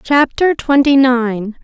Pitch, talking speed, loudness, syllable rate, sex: 260 Hz, 110 wpm, -13 LUFS, 3.4 syllables/s, female